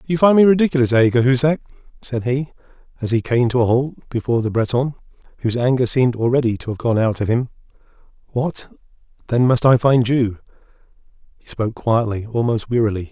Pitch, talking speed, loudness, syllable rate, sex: 125 Hz, 175 wpm, -18 LUFS, 6.1 syllables/s, male